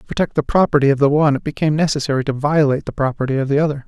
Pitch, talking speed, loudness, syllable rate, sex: 145 Hz, 265 wpm, -17 LUFS, 8.1 syllables/s, male